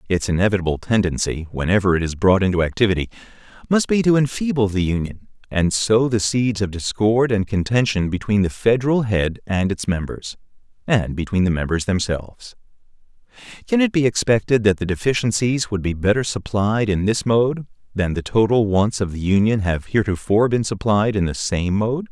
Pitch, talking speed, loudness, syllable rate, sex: 105 Hz, 175 wpm, -19 LUFS, 5.4 syllables/s, male